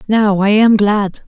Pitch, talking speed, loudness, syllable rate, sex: 205 Hz, 190 wpm, -12 LUFS, 3.6 syllables/s, female